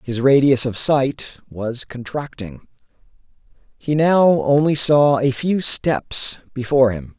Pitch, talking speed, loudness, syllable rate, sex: 135 Hz, 125 wpm, -17 LUFS, 3.6 syllables/s, male